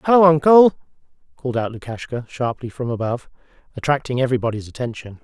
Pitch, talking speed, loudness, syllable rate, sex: 130 Hz, 125 wpm, -19 LUFS, 6.7 syllables/s, male